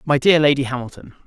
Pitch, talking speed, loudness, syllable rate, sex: 140 Hz, 190 wpm, -17 LUFS, 6.4 syllables/s, male